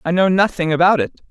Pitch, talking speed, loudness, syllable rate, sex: 175 Hz, 230 wpm, -16 LUFS, 6.8 syllables/s, female